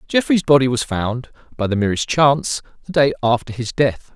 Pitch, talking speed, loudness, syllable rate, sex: 130 Hz, 190 wpm, -18 LUFS, 5.3 syllables/s, male